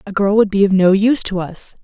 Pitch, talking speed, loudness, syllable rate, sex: 200 Hz, 295 wpm, -15 LUFS, 6.0 syllables/s, female